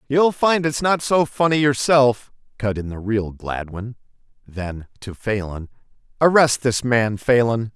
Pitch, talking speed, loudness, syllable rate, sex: 120 Hz, 145 wpm, -19 LUFS, 4.0 syllables/s, male